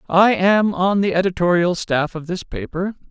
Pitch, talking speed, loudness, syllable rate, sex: 185 Hz, 175 wpm, -18 LUFS, 4.7 syllables/s, male